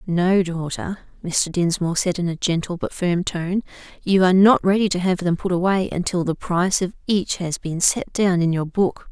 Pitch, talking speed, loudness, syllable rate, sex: 180 Hz, 210 wpm, -20 LUFS, 4.9 syllables/s, female